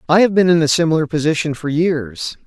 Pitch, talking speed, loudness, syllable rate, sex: 160 Hz, 220 wpm, -16 LUFS, 5.8 syllables/s, male